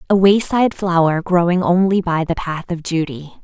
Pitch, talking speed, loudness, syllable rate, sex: 180 Hz, 175 wpm, -17 LUFS, 5.0 syllables/s, female